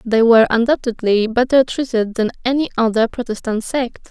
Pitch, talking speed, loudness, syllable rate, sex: 235 Hz, 145 wpm, -17 LUFS, 5.3 syllables/s, female